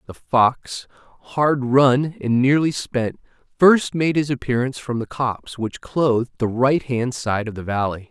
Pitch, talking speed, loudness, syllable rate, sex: 130 Hz, 165 wpm, -20 LUFS, 4.2 syllables/s, male